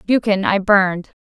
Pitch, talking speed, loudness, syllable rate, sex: 195 Hz, 145 wpm, -16 LUFS, 5.2 syllables/s, female